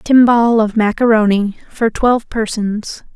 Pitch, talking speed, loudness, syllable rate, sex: 220 Hz, 115 wpm, -14 LUFS, 4.5 syllables/s, female